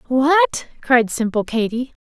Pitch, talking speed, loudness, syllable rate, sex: 245 Hz, 120 wpm, -18 LUFS, 3.6 syllables/s, female